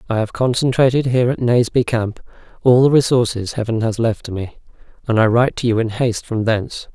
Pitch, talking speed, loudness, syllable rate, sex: 115 Hz, 200 wpm, -17 LUFS, 6.0 syllables/s, male